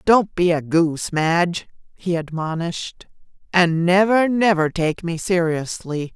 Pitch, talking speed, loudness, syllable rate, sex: 175 Hz, 125 wpm, -19 LUFS, 4.1 syllables/s, female